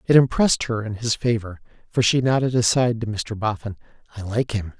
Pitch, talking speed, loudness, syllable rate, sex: 115 Hz, 200 wpm, -21 LUFS, 5.7 syllables/s, male